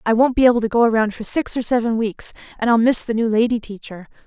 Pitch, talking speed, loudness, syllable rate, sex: 230 Hz, 265 wpm, -18 LUFS, 6.4 syllables/s, female